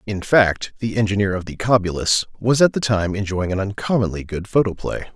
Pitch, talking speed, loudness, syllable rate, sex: 100 Hz, 185 wpm, -20 LUFS, 5.5 syllables/s, male